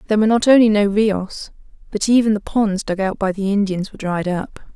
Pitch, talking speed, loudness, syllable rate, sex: 205 Hz, 225 wpm, -17 LUFS, 6.0 syllables/s, female